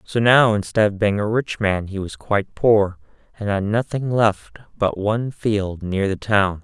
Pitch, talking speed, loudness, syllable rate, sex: 105 Hz, 200 wpm, -20 LUFS, 4.4 syllables/s, male